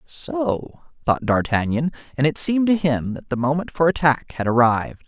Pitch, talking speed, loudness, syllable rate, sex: 145 Hz, 175 wpm, -21 LUFS, 5.0 syllables/s, male